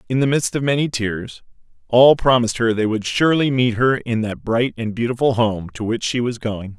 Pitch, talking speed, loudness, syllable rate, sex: 120 Hz, 220 wpm, -18 LUFS, 5.2 syllables/s, male